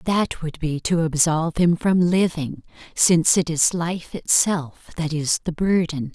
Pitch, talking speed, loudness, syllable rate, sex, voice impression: 165 Hz, 165 wpm, -20 LUFS, 4.0 syllables/s, female, feminine, adult-like, relaxed, slightly weak, slightly dark, fluent, raspy, intellectual, calm, reassuring, elegant, kind, slightly sharp, modest